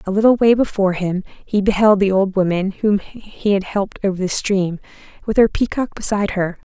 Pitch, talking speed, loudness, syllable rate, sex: 200 Hz, 195 wpm, -18 LUFS, 5.4 syllables/s, female